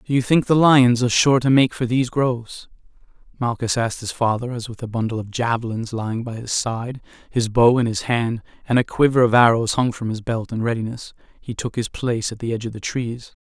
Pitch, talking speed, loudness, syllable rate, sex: 120 Hz, 230 wpm, -20 LUFS, 5.8 syllables/s, male